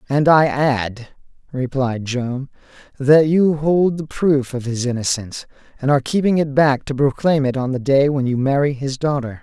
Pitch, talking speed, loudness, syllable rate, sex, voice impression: 135 Hz, 185 wpm, -18 LUFS, 4.8 syllables/s, male, masculine, adult-like, relaxed, weak, slightly dark, slightly halting, raspy, slightly friendly, unique, wild, lively, slightly strict, slightly intense